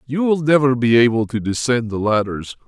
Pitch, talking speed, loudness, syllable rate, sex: 125 Hz, 200 wpm, -17 LUFS, 5.3 syllables/s, male